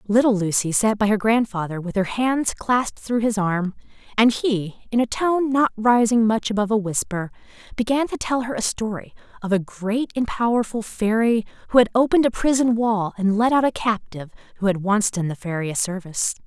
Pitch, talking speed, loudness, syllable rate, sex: 220 Hz, 200 wpm, -21 LUFS, 5.5 syllables/s, female